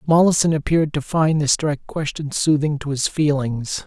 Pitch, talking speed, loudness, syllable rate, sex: 150 Hz, 170 wpm, -19 LUFS, 5.1 syllables/s, male